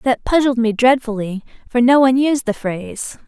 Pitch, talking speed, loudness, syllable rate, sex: 245 Hz, 185 wpm, -16 LUFS, 5.2 syllables/s, female